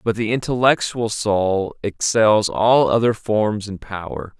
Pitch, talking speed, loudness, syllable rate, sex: 105 Hz, 135 wpm, -19 LUFS, 3.8 syllables/s, male